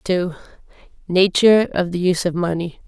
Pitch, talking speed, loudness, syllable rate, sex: 180 Hz, 145 wpm, -18 LUFS, 5.6 syllables/s, female